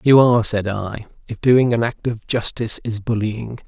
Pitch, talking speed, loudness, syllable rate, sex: 115 Hz, 195 wpm, -19 LUFS, 4.9 syllables/s, male